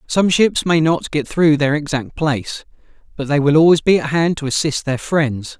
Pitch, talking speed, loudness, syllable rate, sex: 150 Hz, 215 wpm, -16 LUFS, 4.9 syllables/s, male